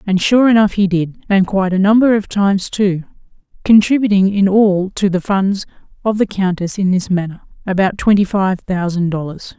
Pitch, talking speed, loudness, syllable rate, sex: 195 Hz, 180 wpm, -15 LUFS, 5.1 syllables/s, female